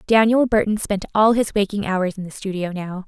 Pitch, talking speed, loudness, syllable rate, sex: 200 Hz, 215 wpm, -20 LUFS, 5.3 syllables/s, female